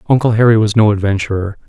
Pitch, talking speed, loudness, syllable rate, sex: 105 Hz, 180 wpm, -13 LUFS, 7.1 syllables/s, male